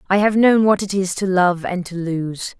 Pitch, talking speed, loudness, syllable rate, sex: 190 Hz, 255 wpm, -18 LUFS, 4.6 syllables/s, female